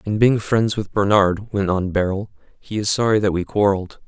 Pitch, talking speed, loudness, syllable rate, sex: 100 Hz, 205 wpm, -19 LUFS, 5.2 syllables/s, male